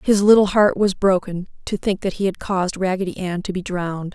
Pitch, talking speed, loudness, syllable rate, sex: 190 Hz, 230 wpm, -20 LUFS, 5.7 syllables/s, female